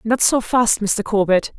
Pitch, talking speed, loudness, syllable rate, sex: 215 Hz, 190 wpm, -17 LUFS, 4.1 syllables/s, female